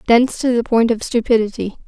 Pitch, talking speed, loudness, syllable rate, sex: 230 Hz, 190 wpm, -17 LUFS, 6.1 syllables/s, female